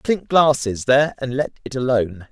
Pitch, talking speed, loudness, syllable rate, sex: 135 Hz, 130 wpm, -19 LUFS, 5.1 syllables/s, male